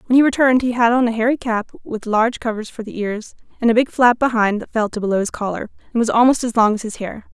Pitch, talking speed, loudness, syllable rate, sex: 230 Hz, 275 wpm, -18 LUFS, 6.5 syllables/s, female